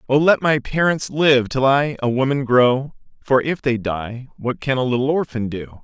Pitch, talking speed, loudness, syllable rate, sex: 130 Hz, 205 wpm, -19 LUFS, 4.6 syllables/s, male